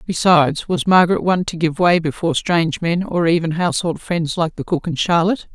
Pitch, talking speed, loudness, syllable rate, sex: 170 Hz, 205 wpm, -17 LUFS, 6.0 syllables/s, female